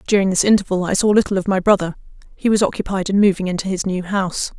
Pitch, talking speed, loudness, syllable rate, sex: 190 Hz, 235 wpm, -18 LUFS, 7.0 syllables/s, female